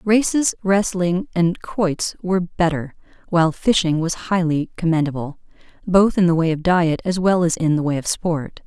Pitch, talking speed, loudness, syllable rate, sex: 175 Hz, 175 wpm, -19 LUFS, 4.7 syllables/s, female